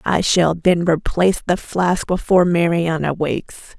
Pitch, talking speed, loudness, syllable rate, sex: 170 Hz, 145 wpm, -18 LUFS, 4.7 syllables/s, female